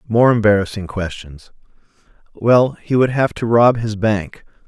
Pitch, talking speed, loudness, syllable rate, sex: 110 Hz, 140 wpm, -16 LUFS, 4.4 syllables/s, male